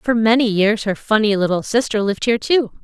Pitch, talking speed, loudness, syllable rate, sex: 220 Hz, 210 wpm, -17 LUFS, 5.7 syllables/s, female